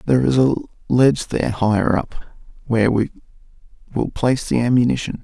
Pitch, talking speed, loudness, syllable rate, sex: 125 Hz, 140 wpm, -19 LUFS, 6.9 syllables/s, male